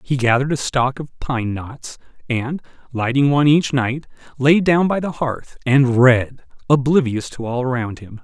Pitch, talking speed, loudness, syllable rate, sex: 135 Hz, 175 wpm, -18 LUFS, 4.5 syllables/s, male